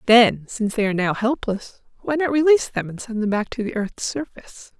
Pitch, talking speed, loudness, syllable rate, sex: 230 Hz, 225 wpm, -21 LUFS, 5.7 syllables/s, female